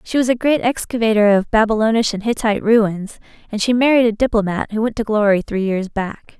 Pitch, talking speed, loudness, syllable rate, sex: 220 Hz, 205 wpm, -17 LUFS, 5.7 syllables/s, female